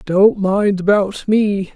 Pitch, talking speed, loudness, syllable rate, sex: 200 Hz, 135 wpm, -15 LUFS, 3.0 syllables/s, female